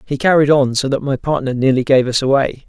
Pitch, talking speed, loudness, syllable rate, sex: 135 Hz, 245 wpm, -15 LUFS, 5.9 syllables/s, male